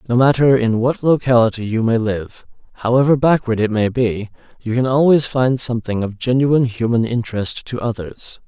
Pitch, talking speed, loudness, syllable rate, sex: 120 Hz, 170 wpm, -17 LUFS, 5.3 syllables/s, male